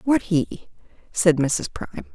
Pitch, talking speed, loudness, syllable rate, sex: 180 Hz, 140 wpm, -22 LUFS, 3.9 syllables/s, female